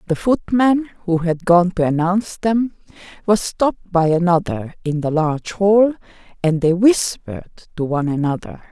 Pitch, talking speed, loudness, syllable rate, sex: 180 Hz, 150 wpm, -18 LUFS, 4.7 syllables/s, female